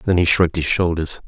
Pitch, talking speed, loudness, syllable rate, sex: 85 Hz, 235 wpm, -18 LUFS, 6.4 syllables/s, male